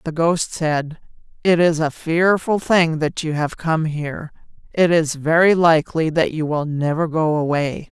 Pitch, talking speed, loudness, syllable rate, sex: 160 Hz, 175 wpm, -18 LUFS, 4.3 syllables/s, female